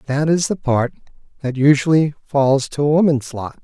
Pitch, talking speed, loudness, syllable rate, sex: 140 Hz, 180 wpm, -17 LUFS, 4.7 syllables/s, male